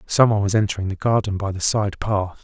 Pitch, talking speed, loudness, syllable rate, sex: 100 Hz, 220 wpm, -20 LUFS, 6.1 syllables/s, male